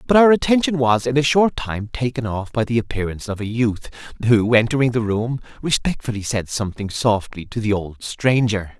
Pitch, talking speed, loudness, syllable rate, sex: 120 Hz, 190 wpm, -20 LUFS, 5.4 syllables/s, male